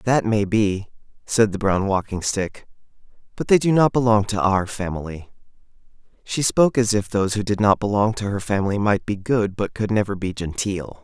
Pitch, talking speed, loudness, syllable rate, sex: 105 Hz, 195 wpm, -21 LUFS, 5.2 syllables/s, male